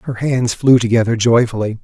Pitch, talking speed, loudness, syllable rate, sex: 115 Hz, 165 wpm, -14 LUFS, 5.0 syllables/s, male